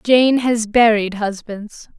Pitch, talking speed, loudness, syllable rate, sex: 220 Hz, 120 wpm, -16 LUFS, 3.3 syllables/s, female